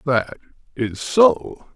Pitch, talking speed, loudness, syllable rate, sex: 125 Hz, 105 wpm, -19 LUFS, 2.5 syllables/s, male